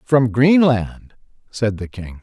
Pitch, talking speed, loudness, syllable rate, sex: 120 Hz, 135 wpm, -17 LUFS, 3.4 syllables/s, male